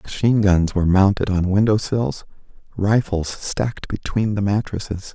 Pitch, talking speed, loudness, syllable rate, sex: 100 Hz, 140 wpm, -20 LUFS, 4.8 syllables/s, male